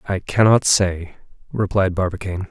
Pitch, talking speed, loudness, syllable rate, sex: 95 Hz, 120 wpm, -18 LUFS, 5.5 syllables/s, male